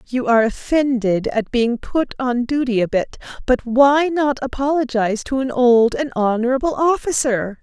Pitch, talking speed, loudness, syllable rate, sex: 250 Hz, 155 wpm, -18 LUFS, 4.7 syllables/s, female